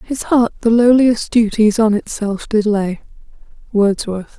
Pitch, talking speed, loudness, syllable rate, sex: 220 Hz, 135 wpm, -15 LUFS, 4.2 syllables/s, female